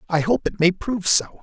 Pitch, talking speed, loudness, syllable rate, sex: 180 Hz, 250 wpm, -20 LUFS, 5.7 syllables/s, male